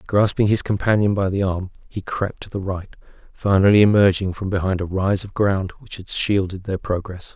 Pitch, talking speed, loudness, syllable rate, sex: 95 Hz, 195 wpm, -20 LUFS, 5.2 syllables/s, male